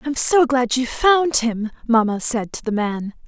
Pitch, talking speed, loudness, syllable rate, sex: 245 Hz, 200 wpm, -18 LUFS, 4.1 syllables/s, female